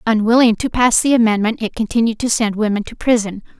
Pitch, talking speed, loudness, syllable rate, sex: 225 Hz, 200 wpm, -16 LUFS, 6.0 syllables/s, female